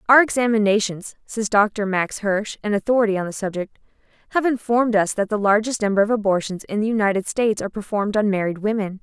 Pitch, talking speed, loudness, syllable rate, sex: 210 Hz, 195 wpm, -20 LUFS, 5.8 syllables/s, female